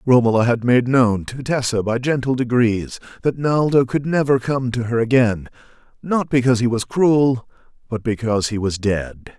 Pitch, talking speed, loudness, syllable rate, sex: 120 Hz, 175 wpm, -19 LUFS, 4.8 syllables/s, male